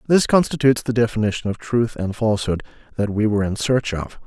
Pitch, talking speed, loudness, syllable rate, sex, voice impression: 115 Hz, 195 wpm, -20 LUFS, 6.2 syllables/s, male, masculine, middle-aged, tensed, powerful, hard, fluent, raspy, cool, calm, mature, reassuring, wild, strict